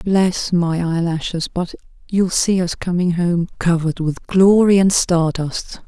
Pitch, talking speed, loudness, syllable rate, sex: 175 Hz, 155 wpm, -17 LUFS, 4.0 syllables/s, female